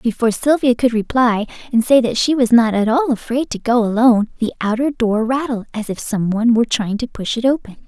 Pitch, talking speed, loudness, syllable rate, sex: 235 Hz, 220 wpm, -17 LUFS, 5.8 syllables/s, female